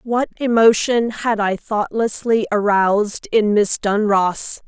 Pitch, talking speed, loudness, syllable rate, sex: 215 Hz, 115 wpm, -17 LUFS, 3.7 syllables/s, female